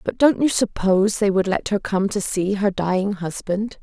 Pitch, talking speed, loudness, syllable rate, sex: 200 Hz, 220 wpm, -20 LUFS, 4.8 syllables/s, female